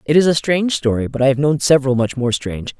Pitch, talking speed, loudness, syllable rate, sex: 140 Hz, 280 wpm, -17 LUFS, 6.8 syllables/s, female